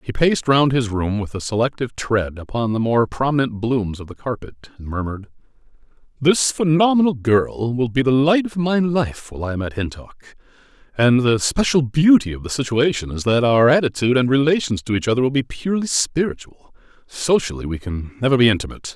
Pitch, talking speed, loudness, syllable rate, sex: 125 Hz, 190 wpm, -19 LUFS, 5.7 syllables/s, male